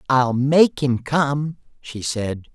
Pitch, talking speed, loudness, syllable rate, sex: 135 Hz, 140 wpm, -20 LUFS, 2.8 syllables/s, male